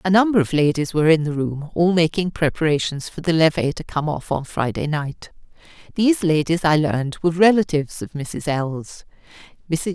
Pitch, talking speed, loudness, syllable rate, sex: 160 Hz, 175 wpm, -20 LUFS, 5.4 syllables/s, female